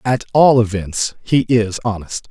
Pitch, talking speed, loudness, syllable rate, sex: 115 Hz, 155 wpm, -16 LUFS, 4.1 syllables/s, male